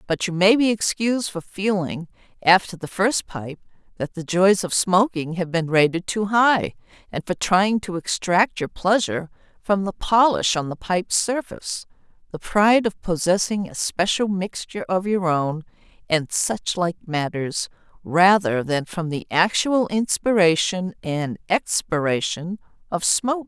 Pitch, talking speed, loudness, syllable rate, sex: 185 Hz, 150 wpm, -21 LUFS, 4.4 syllables/s, female